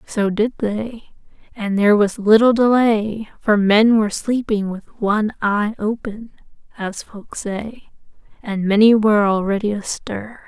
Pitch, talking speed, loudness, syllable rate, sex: 215 Hz, 140 wpm, -18 LUFS, 4.1 syllables/s, female